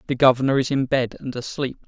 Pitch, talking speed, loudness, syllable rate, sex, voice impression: 130 Hz, 225 wpm, -21 LUFS, 6.3 syllables/s, male, very masculine, very adult-like, very middle-aged, very thick, slightly tensed, powerful, slightly bright, slightly soft, slightly muffled, fluent, slightly raspy, very cool, intellectual, slightly refreshing, sincere, very calm, mature, friendly, reassuring, unique, elegant, wild, sweet, lively, kind, slightly modest